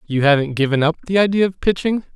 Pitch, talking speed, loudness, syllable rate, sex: 170 Hz, 225 wpm, -17 LUFS, 6.7 syllables/s, male